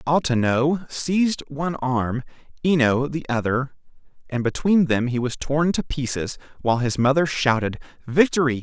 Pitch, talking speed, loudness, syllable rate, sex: 140 Hz, 140 wpm, -22 LUFS, 4.8 syllables/s, male